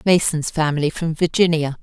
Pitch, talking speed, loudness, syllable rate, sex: 160 Hz, 130 wpm, -19 LUFS, 5.3 syllables/s, female